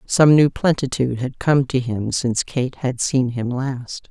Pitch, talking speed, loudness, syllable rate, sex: 130 Hz, 190 wpm, -19 LUFS, 4.3 syllables/s, female